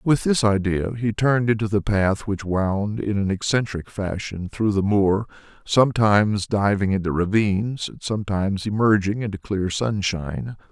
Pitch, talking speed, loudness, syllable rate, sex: 105 Hz, 150 wpm, -22 LUFS, 4.7 syllables/s, male